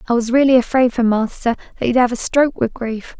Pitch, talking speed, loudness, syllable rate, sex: 240 Hz, 245 wpm, -17 LUFS, 6.1 syllables/s, female